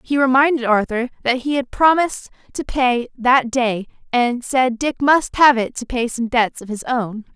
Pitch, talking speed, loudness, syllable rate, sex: 250 Hz, 195 wpm, -18 LUFS, 4.5 syllables/s, female